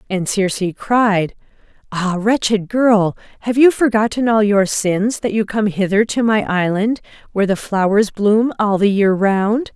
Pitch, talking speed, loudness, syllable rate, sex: 210 Hz, 165 wpm, -16 LUFS, 4.3 syllables/s, female